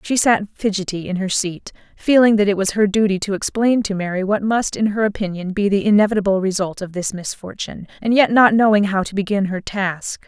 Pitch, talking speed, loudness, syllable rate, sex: 200 Hz, 215 wpm, -18 LUFS, 5.6 syllables/s, female